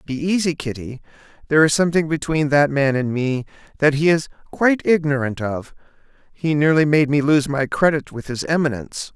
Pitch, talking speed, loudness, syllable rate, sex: 145 Hz, 175 wpm, -19 LUFS, 5.6 syllables/s, male